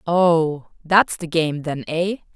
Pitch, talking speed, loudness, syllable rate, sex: 165 Hz, 155 wpm, -20 LUFS, 3.2 syllables/s, female